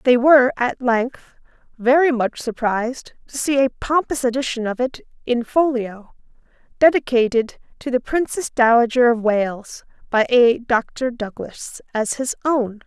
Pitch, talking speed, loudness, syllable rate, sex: 245 Hz, 140 wpm, -19 LUFS, 4.3 syllables/s, female